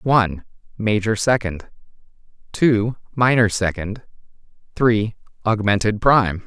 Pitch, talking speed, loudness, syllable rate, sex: 110 Hz, 85 wpm, -19 LUFS, 5.3 syllables/s, male